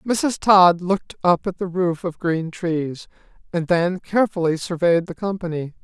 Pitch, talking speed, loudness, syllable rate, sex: 175 Hz, 165 wpm, -20 LUFS, 4.5 syllables/s, male